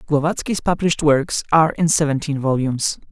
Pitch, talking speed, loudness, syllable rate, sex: 150 Hz, 135 wpm, -18 LUFS, 5.8 syllables/s, male